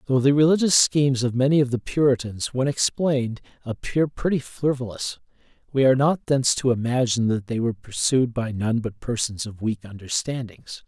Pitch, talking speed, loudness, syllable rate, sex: 125 Hz, 170 wpm, -22 LUFS, 5.5 syllables/s, male